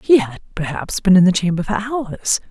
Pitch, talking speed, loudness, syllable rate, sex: 195 Hz, 215 wpm, -17 LUFS, 5.0 syllables/s, female